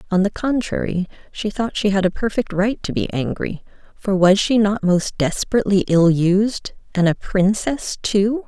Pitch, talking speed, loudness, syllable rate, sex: 200 Hz, 170 wpm, -19 LUFS, 4.5 syllables/s, female